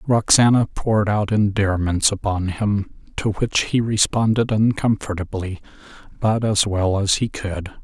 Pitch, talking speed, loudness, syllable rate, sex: 105 Hz, 130 wpm, -19 LUFS, 4.2 syllables/s, male